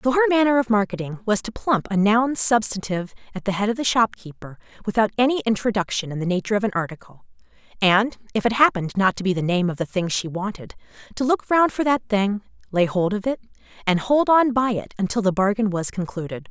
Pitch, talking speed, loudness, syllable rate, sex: 210 Hz, 220 wpm, -21 LUFS, 6.2 syllables/s, female